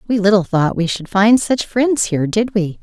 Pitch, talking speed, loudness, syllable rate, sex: 205 Hz, 235 wpm, -16 LUFS, 4.9 syllables/s, female